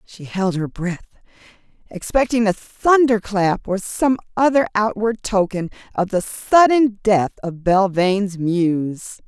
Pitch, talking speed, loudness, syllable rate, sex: 205 Hz, 125 wpm, -19 LUFS, 4.1 syllables/s, female